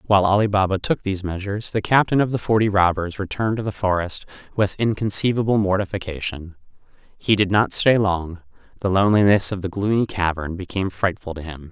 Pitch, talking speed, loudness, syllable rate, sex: 95 Hz, 175 wpm, -20 LUFS, 6.0 syllables/s, male